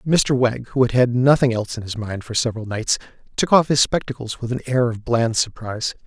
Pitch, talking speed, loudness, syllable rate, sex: 120 Hz, 230 wpm, -20 LUFS, 3.4 syllables/s, male